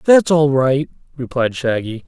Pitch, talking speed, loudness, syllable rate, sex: 140 Hz, 145 wpm, -16 LUFS, 4.3 syllables/s, male